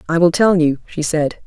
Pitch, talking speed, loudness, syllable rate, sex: 165 Hz, 245 wpm, -16 LUFS, 5.0 syllables/s, female